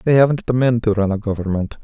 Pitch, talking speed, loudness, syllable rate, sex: 115 Hz, 260 wpm, -18 LUFS, 6.5 syllables/s, male